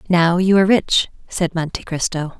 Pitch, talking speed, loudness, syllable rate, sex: 175 Hz, 175 wpm, -18 LUFS, 5.0 syllables/s, female